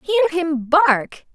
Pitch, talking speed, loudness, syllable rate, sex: 320 Hz, 135 wpm, -17 LUFS, 4.7 syllables/s, female